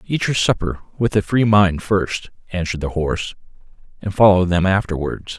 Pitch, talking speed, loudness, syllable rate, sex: 95 Hz, 165 wpm, -18 LUFS, 5.2 syllables/s, male